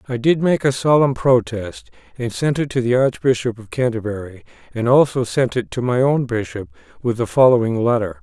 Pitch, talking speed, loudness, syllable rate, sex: 125 Hz, 190 wpm, -18 LUFS, 5.3 syllables/s, male